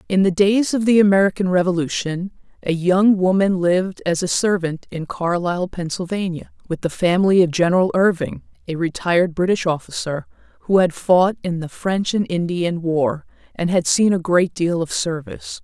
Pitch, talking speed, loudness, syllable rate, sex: 180 Hz, 170 wpm, -19 LUFS, 5.1 syllables/s, female